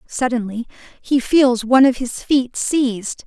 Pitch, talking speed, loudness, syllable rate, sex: 250 Hz, 145 wpm, -17 LUFS, 4.4 syllables/s, female